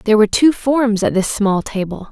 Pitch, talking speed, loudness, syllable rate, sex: 220 Hz, 225 wpm, -15 LUFS, 5.3 syllables/s, female